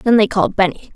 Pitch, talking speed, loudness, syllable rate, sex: 200 Hz, 255 wpm, -16 LUFS, 6.6 syllables/s, female